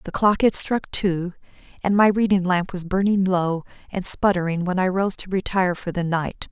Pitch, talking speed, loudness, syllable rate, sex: 185 Hz, 205 wpm, -21 LUFS, 5.0 syllables/s, female